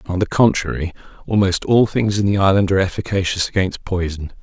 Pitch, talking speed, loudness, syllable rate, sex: 95 Hz, 175 wpm, -18 LUFS, 5.9 syllables/s, male